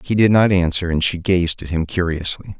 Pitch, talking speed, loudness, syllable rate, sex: 90 Hz, 230 wpm, -18 LUFS, 5.2 syllables/s, male